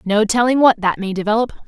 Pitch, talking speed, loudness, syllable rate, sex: 220 Hz, 215 wpm, -16 LUFS, 6.3 syllables/s, female